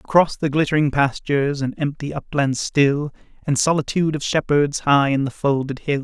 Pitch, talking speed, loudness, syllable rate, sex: 145 Hz, 170 wpm, -20 LUFS, 5.2 syllables/s, male